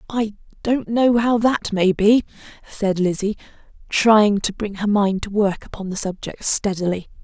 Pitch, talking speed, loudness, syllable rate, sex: 205 Hz, 165 wpm, -19 LUFS, 4.4 syllables/s, female